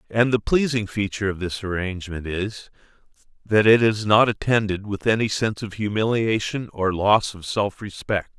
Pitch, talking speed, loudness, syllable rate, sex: 105 Hz, 165 wpm, -22 LUFS, 5.0 syllables/s, male